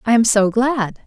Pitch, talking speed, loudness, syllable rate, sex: 225 Hz, 225 wpm, -16 LUFS, 4.5 syllables/s, female